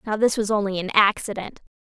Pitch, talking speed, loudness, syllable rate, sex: 205 Hz, 195 wpm, -21 LUFS, 6.3 syllables/s, female